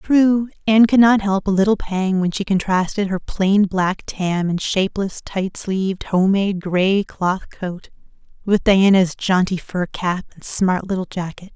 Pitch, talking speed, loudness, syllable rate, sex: 190 Hz, 165 wpm, -18 LUFS, 4.3 syllables/s, female